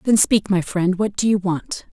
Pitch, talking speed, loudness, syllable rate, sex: 195 Hz, 240 wpm, -19 LUFS, 4.6 syllables/s, female